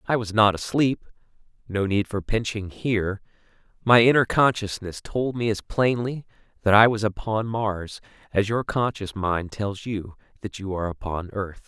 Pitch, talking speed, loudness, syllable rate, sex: 105 Hz, 165 wpm, -24 LUFS, 4.6 syllables/s, male